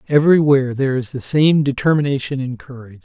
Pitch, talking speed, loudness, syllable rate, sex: 135 Hz, 160 wpm, -17 LUFS, 6.6 syllables/s, male